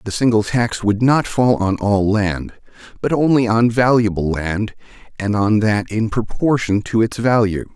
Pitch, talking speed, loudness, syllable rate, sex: 110 Hz, 170 wpm, -17 LUFS, 4.3 syllables/s, male